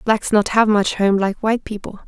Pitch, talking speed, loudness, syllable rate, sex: 210 Hz, 230 wpm, -17 LUFS, 5.2 syllables/s, female